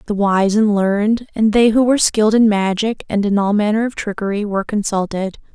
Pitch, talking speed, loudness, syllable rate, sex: 210 Hz, 205 wpm, -16 LUFS, 5.6 syllables/s, female